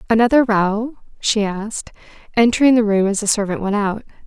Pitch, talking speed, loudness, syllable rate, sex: 215 Hz, 170 wpm, -17 LUFS, 5.6 syllables/s, female